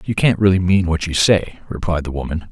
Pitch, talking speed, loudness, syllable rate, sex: 90 Hz, 240 wpm, -17 LUFS, 5.6 syllables/s, male